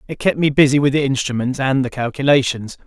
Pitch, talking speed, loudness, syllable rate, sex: 135 Hz, 210 wpm, -17 LUFS, 6.0 syllables/s, male